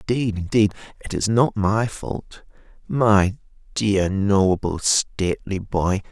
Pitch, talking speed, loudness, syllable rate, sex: 100 Hz, 120 wpm, -21 LUFS, 3.5 syllables/s, male